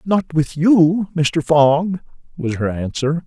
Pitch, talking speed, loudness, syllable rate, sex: 160 Hz, 145 wpm, -17 LUFS, 3.4 syllables/s, male